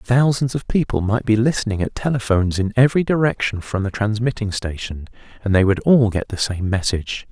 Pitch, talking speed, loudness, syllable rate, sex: 110 Hz, 190 wpm, -19 LUFS, 5.7 syllables/s, male